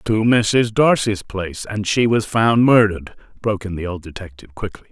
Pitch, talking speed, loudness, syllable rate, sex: 105 Hz, 185 wpm, -17 LUFS, 5.3 syllables/s, male